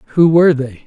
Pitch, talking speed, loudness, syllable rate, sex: 145 Hz, 205 wpm, -12 LUFS, 7.3 syllables/s, male